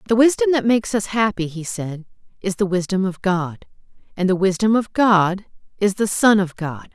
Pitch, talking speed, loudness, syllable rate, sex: 195 Hz, 200 wpm, -19 LUFS, 5.0 syllables/s, female